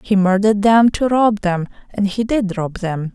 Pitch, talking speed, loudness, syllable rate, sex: 200 Hz, 210 wpm, -16 LUFS, 4.6 syllables/s, female